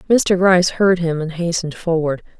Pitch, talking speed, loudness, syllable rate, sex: 170 Hz, 175 wpm, -17 LUFS, 5.3 syllables/s, female